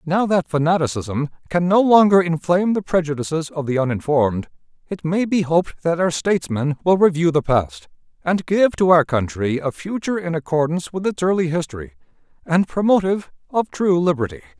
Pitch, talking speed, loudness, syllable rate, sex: 165 Hz, 170 wpm, -19 LUFS, 5.6 syllables/s, male